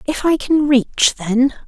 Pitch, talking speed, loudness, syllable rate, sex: 270 Hz, 180 wpm, -16 LUFS, 3.7 syllables/s, female